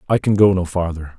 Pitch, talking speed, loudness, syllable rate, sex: 90 Hz, 255 wpm, -17 LUFS, 6.1 syllables/s, male